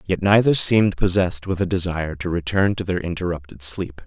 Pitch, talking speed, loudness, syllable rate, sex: 90 Hz, 190 wpm, -20 LUFS, 5.8 syllables/s, male